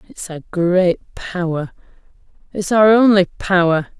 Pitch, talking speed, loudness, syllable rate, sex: 185 Hz, 120 wpm, -16 LUFS, 3.9 syllables/s, female